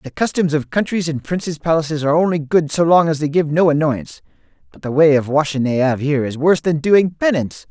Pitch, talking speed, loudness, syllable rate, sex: 155 Hz, 235 wpm, -17 LUFS, 6.2 syllables/s, male